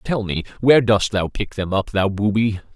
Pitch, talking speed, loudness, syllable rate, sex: 105 Hz, 220 wpm, -19 LUFS, 5.0 syllables/s, male